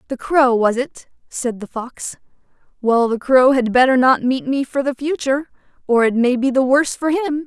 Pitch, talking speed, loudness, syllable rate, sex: 260 Hz, 210 wpm, -17 LUFS, 4.9 syllables/s, female